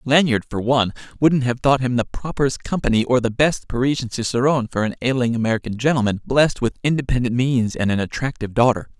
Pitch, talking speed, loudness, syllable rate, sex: 125 Hz, 185 wpm, -20 LUFS, 6.4 syllables/s, male